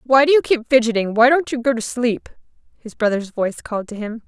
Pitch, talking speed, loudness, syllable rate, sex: 240 Hz, 240 wpm, -18 LUFS, 6.1 syllables/s, female